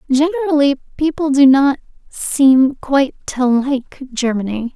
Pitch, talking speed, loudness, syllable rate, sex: 275 Hz, 115 wpm, -15 LUFS, 4.2 syllables/s, female